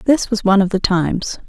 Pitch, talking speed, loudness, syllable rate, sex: 200 Hz, 245 wpm, -16 LUFS, 5.8 syllables/s, female